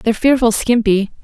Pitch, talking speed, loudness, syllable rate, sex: 225 Hz, 145 wpm, -14 LUFS, 6.8 syllables/s, female